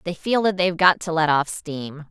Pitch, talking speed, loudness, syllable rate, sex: 165 Hz, 255 wpm, -20 LUFS, 5.0 syllables/s, female